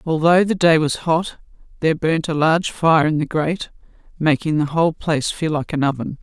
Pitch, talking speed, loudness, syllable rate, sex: 155 Hz, 205 wpm, -18 LUFS, 5.5 syllables/s, female